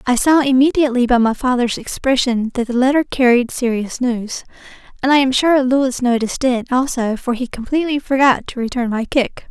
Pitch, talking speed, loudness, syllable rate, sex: 250 Hz, 185 wpm, -16 LUFS, 5.4 syllables/s, female